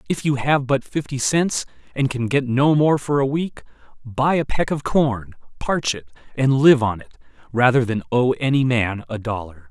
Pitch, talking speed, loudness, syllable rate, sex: 130 Hz, 200 wpm, -20 LUFS, 4.6 syllables/s, male